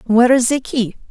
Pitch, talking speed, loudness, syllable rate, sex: 240 Hz, 220 wpm, -15 LUFS, 5.8 syllables/s, female